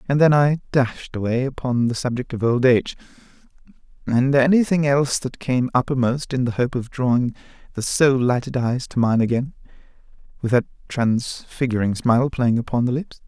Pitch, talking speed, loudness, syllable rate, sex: 125 Hz, 170 wpm, -20 LUFS, 5.2 syllables/s, male